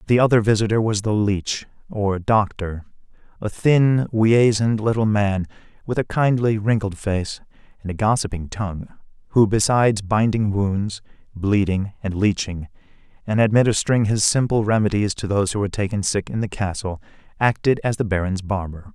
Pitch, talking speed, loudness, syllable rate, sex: 105 Hz, 150 wpm, -20 LUFS, 5.1 syllables/s, male